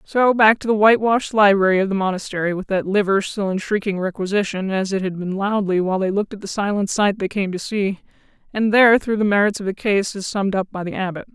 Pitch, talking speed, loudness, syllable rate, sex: 200 Hz, 235 wpm, -19 LUFS, 6.3 syllables/s, female